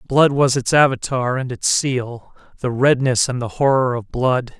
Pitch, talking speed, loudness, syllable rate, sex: 130 Hz, 170 wpm, -18 LUFS, 4.4 syllables/s, male